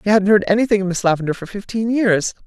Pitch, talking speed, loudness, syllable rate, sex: 200 Hz, 245 wpm, -17 LUFS, 6.6 syllables/s, female